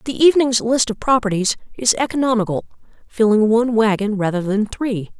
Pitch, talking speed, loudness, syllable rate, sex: 225 Hz, 150 wpm, -17 LUFS, 5.7 syllables/s, female